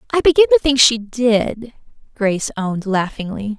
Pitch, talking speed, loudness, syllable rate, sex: 235 Hz, 150 wpm, -16 LUFS, 5.1 syllables/s, female